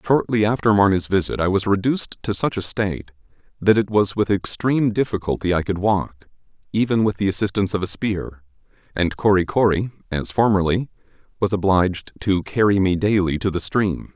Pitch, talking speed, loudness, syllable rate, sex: 100 Hz, 175 wpm, -20 LUFS, 5.5 syllables/s, male